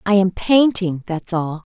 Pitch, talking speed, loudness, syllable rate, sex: 190 Hz, 175 wpm, -18 LUFS, 4.1 syllables/s, female